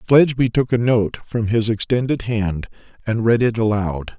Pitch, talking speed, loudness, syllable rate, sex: 115 Hz, 170 wpm, -19 LUFS, 4.8 syllables/s, male